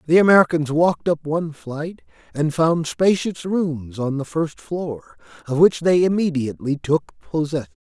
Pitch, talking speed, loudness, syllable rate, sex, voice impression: 155 Hz, 155 wpm, -20 LUFS, 4.7 syllables/s, male, very masculine, slightly old, very thick, slightly tensed, slightly weak, slightly bright, hard, muffled, slightly halting, raspy, cool, slightly intellectual, slightly refreshing, sincere, calm, very mature, slightly friendly, slightly reassuring, unique, very wild, sweet, lively, strict, intense